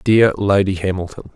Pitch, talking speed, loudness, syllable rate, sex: 95 Hz, 130 wpm, -17 LUFS, 5.0 syllables/s, male